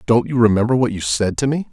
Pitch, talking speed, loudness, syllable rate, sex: 115 Hz, 280 wpm, -17 LUFS, 6.4 syllables/s, male